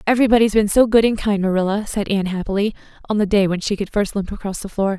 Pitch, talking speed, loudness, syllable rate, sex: 205 Hz, 265 wpm, -18 LUFS, 7.3 syllables/s, female